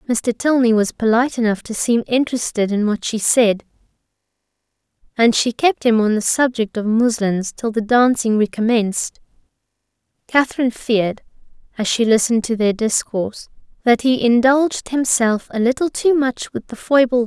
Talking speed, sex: 160 wpm, female